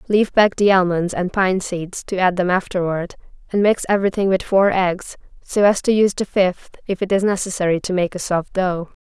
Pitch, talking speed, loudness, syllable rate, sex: 190 Hz, 215 wpm, -18 LUFS, 5.3 syllables/s, female